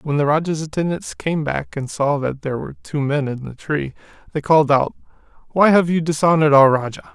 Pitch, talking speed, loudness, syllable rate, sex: 150 Hz, 210 wpm, -19 LUFS, 5.9 syllables/s, male